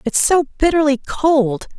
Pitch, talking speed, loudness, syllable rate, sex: 285 Hz, 135 wpm, -16 LUFS, 3.7 syllables/s, female